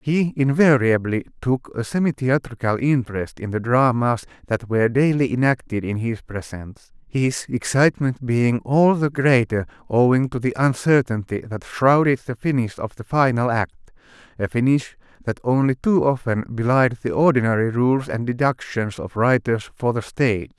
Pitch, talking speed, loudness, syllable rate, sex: 125 Hz, 150 wpm, -20 LUFS, 4.8 syllables/s, male